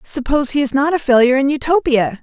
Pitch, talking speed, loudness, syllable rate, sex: 275 Hz, 215 wpm, -15 LUFS, 6.6 syllables/s, female